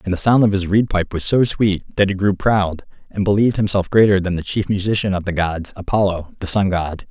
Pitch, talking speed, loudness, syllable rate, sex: 95 Hz, 245 wpm, -18 LUFS, 5.6 syllables/s, male